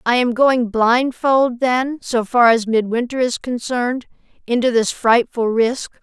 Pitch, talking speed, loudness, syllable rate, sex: 240 Hz, 130 wpm, -17 LUFS, 4.0 syllables/s, female